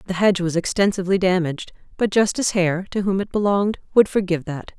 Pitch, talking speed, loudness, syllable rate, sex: 190 Hz, 190 wpm, -20 LUFS, 6.7 syllables/s, female